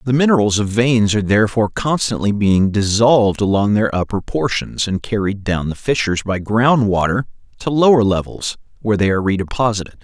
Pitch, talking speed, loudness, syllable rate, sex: 110 Hz, 165 wpm, -16 LUFS, 5.8 syllables/s, male